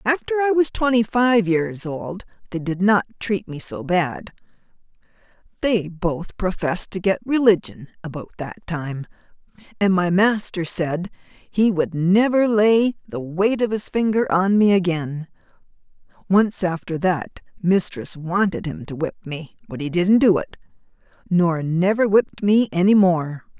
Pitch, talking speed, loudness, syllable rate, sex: 190 Hz, 150 wpm, -20 LUFS, 4.2 syllables/s, female